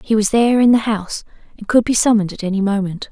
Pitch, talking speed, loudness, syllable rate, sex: 215 Hz, 230 wpm, -16 LUFS, 7.0 syllables/s, female